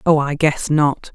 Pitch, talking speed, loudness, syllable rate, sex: 150 Hz, 210 wpm, -17 LUFS, 3.9 syllables/s, female